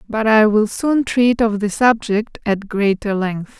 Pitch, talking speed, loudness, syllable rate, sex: 215 Hz, 185 wpm, -17 LUFS, 3.9 syllables/s, female